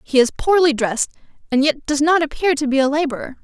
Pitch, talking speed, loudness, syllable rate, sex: 290 Hz, 225 wpm, -18 LUFS, 6.2 syllables/s, female